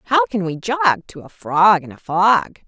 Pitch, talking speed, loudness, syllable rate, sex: 190 Hz, 225 wpm, -17 LUFS, 4.1 syllables/s, female